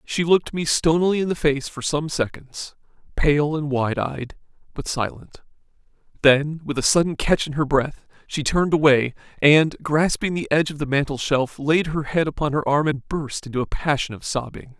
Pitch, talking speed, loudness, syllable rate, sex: 150 Hz, 195 wpm, -21 LUFS, 5.0 syllables/s, male